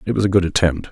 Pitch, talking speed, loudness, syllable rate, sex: 90 Hz, 330 wpm, -17 LUFS, 7.6 syllables/s, male